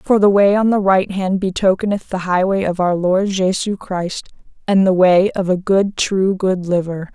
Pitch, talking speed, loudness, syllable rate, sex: 190 Hz, 200 wpm, -16 LUFS, 4.5 syllables/s, female